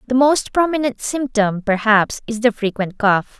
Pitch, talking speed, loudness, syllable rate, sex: 230 Hz, 160 wpm, -18 LUFS, 4.5 syllables/s, female